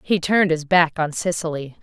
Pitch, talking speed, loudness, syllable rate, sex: 165 Hz, 195 wpm, -20 LUFS, 5.4 syllables/s, female